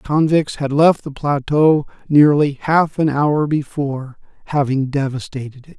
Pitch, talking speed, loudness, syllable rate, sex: 145 Hz, 145 wpm, -17 LUFS, 4.4 syllables/s, male